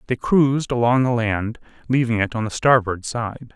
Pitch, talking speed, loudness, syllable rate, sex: 120 Hz, 185 wpm, -20 LUFS, 4.9 syllables/s, male